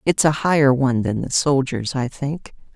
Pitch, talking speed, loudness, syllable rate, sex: 135 Hz, 195 wpm, -19 LUFS, 4.9 syllables/s, female